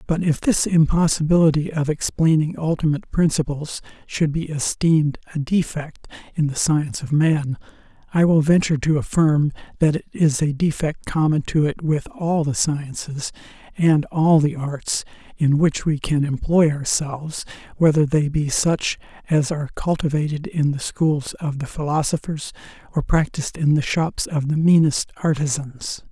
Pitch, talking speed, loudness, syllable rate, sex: 150 Hz, 155 wpm, -20 LUFS, 4.7 syllables/s, male